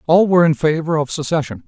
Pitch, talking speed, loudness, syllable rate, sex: 160 Hz, 215 wpm, -16 LUFS, 6.5 syllables/s, male